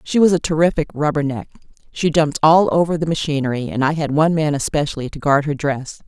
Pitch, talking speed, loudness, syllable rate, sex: 150 Hz, 210 wpm, -18 LUFS, 6.2 syllables/s, female